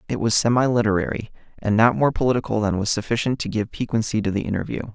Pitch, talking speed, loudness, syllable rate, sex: 110 Hz, 205 wpm, -21 LUFS, 6.7 syllables/s, male